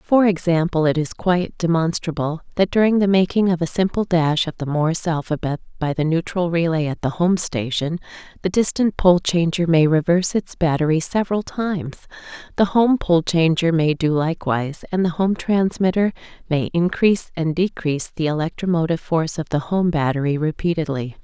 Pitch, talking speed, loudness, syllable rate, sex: 170 Hz, 165 wpm, -20 LUFS, 5.4 syllables/s, female